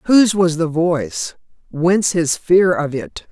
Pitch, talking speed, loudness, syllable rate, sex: 175 Hz, 145 wpm, -16 LUFS, 4.3 syllables/s, female